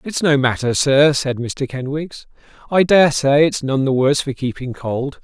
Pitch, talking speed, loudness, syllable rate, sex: 140 Hz, 195 wpm, -17 LUFS, 4.5 syllables/s, male